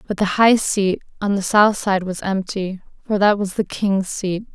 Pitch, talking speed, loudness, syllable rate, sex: 200 Hz, 210 wpm, -19 LUFS, 4.3 syllables/s, female